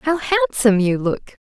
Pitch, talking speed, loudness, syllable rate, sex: 210 Hz, 165 wpm, -18 LUFS, 4.4 syllables/s, female